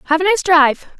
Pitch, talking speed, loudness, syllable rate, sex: 335 Hz, 240 wpm, -13 LUFS, 6.8 syllables/s, female